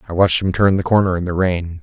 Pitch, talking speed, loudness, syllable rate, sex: 90 Hz, 295 wpm, -16 LUFS, 6.6 syllables/s, male